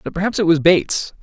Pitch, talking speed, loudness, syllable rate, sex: 175 Hz, 245 wpm, -16 LUFS, 6.5 syllables/s, male